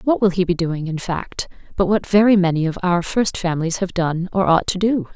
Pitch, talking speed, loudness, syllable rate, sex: 185 Hz, 245 wpm, -19 LUFS, 5.4 syllables/s, female